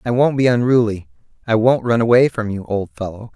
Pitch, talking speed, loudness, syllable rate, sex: 115 Hz, 215 wpm, -17 LUFS, 5.8 syllables/s, male